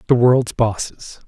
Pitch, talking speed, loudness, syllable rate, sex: 120 Hz, 140 wpm, -17 LUFS, 3.9 syllables/s, male